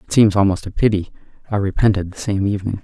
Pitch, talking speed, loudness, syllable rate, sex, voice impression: 100 Hz, 210 wpm, -18 LUFS, 6.9 syllables/s, male, masculine, adult-like, weak, dark, halting, calm, friendly, reassuring, kind, modest